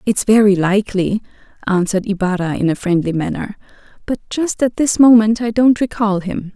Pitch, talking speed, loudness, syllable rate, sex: 205 Hz, 165 wpm, -16 LUFS, 5.4 syllables/s, female